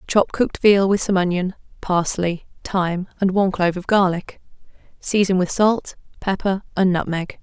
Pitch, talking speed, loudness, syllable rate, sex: 185 Hz, 155 wpm, -20 LUFS, 5.0 syllables/s, female